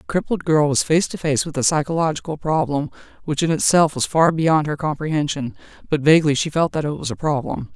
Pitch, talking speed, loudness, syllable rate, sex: 155 Hz, 215 wpm, -19 LUFS, 6.0 syllables/s, female